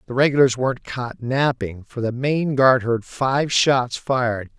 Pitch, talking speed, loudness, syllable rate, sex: 125 Hz, 170 wpm, -20 LUFS, 4.2 syllables/s, male